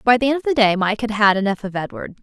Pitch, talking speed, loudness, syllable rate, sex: 215 Hz, 325 wpm, -18 LUFS, 6.7 syllables/s, female